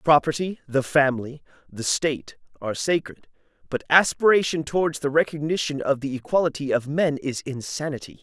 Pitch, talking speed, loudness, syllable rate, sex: 145 Hz, 140 wpm, -23 LUFS, 5.5 syllables/s, male